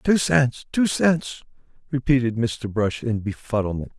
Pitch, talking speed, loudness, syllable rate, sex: 120 Hz, 135 wpm, -22 LUFS, 4.3 syllables/s, male